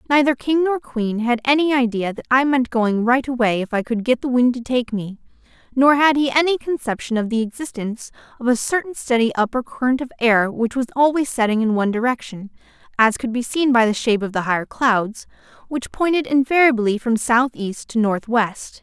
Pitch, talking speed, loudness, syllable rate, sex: 245 Hz, 200 wpm, -19 LUFS, 5.4 syllables/s, female